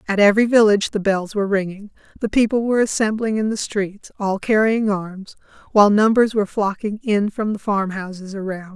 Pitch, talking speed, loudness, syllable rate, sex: 205 Hz, 180 wpm, -19 LUFS, 5.6 syllables/s, female